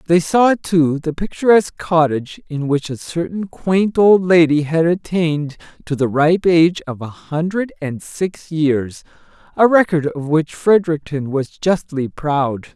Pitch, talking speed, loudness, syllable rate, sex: 160 Hz, 150 wpm, -17 LUFS, 4.3 syllables/s, male